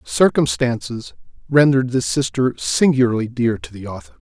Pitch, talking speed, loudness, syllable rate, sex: 115 Hz, 125 wpm, -18 LUFS, 5.1 syllables/s, male